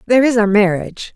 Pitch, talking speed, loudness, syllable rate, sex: 220 Hz, 210 wpm, -14 LUFS, 7.4 syllables/s, female